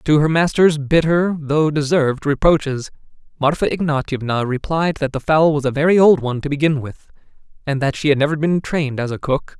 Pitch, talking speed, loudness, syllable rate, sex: 150 Hz, 195 wpm, -17 LUFS, 5.6 syllables/s, male